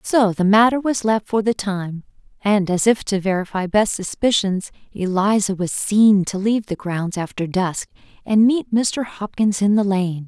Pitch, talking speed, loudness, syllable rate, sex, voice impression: 205 Hz, 180 wpm, -19 LUFS, 4.5 syllables/s, female, very feminine, young, very thin, slightly tensed, weak, bright, soft, very clear, fluent, slightly raspy, very cute, very intellectual, refreshing, sincere, very calm, very friendly, very reassuring, very unique, very elegant, slightly wild, very sweet, lively, very kind, slightly sharp